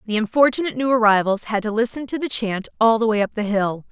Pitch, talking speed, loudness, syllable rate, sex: 225 Hz, 245 wpm, -20 LUFS, 6.4 syllables/s, female